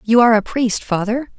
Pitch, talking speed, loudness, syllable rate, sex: 230 Hz, 215 wpm, -16 LUFS, 5.7 syllables/s, female